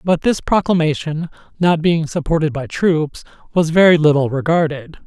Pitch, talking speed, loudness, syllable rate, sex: 160 Hz, 140 wpm, -16 LUFS, 4.9 syllables/s, male